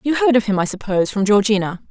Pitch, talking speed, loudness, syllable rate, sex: 215 Hz, 250 wpm, -17 LUFS, 6.9 syllables/s, female